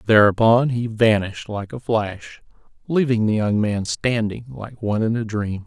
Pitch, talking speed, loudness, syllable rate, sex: 110 Hz, 170 wpm, -20 LUFS, 4.6 syllables/s, male